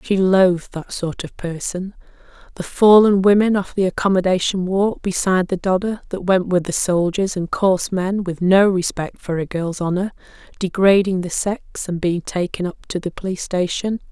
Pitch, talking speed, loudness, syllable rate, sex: 185 Hz, 180 wpm, -19 LUFS, 4.9 syllables/s, female